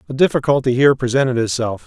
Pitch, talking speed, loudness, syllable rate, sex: 125 Hz, 160 wpm, -16 LUFS, 7.1 syllables/s, male